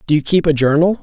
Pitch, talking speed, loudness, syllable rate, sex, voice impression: 160 Hz, 295 wpm, -14 LUFS, 6.7 syllables/s, male, masculine, very adult-like, slightly soft, sincere, calm, kind